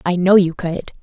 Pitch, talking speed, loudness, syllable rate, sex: 180 Hz, 235 wpm, -16 LUFS, 4.8 syllables/s, female